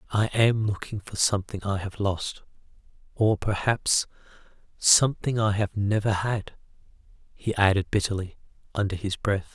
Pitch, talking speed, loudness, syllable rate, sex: 105 Hz, 125 wpm, -25 LUFS, 4.8 syllables/s, male